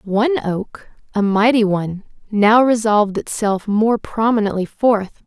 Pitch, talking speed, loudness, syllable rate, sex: 215 Hz, 125 wpm, -17 LUFS, 4.4 syllables/s, female